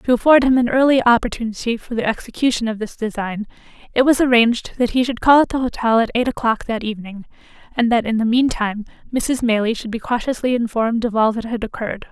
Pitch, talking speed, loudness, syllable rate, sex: 235 Hz, 215 wpm, -18 LUFS, 6.4 syllables/s, female